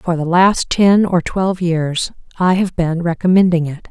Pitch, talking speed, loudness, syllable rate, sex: 175 Hz, 185 wpm, -15 LUFS, 4.4 syllables/s, female